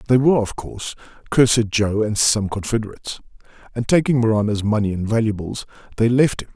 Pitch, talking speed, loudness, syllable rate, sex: 110 Hz, 165 wpm, -19 LUFS, 6.1 syllables/s, male